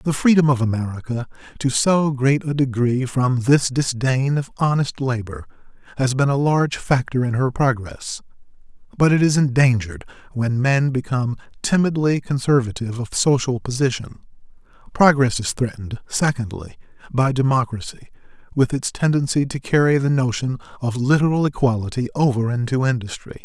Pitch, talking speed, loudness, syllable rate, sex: 130 Hz, 140 wpm, -20 LUFS, 5.2 syllables/s, male